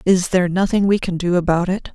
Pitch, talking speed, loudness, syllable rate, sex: 185 Hz, 245 wpm, -18 LUFS, 6.0 syllables/s, female